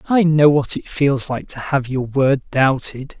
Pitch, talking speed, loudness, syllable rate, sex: 140 Hz, 205 wpm, -17 LUFS, 4.1 syllables/s, male